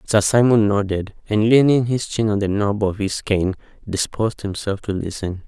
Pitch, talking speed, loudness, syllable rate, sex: 105 Hz, 185 wpm, -19 LUFS, 4.9 syllables/s, male